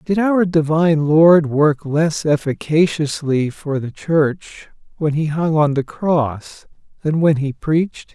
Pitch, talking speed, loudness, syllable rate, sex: 155 Hz, 145 wpm, -17 LUFS, 3.7 syllables/s, male